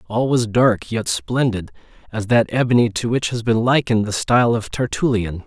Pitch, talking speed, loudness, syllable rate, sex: 115 Hz, 175 wpm, -18 LUFS, 5.1 syllables/s, male